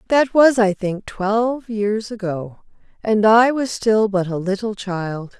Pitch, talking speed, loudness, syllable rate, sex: 210 Hz, 165 wpm, -18 LUFS, 3.7 syllables/s, female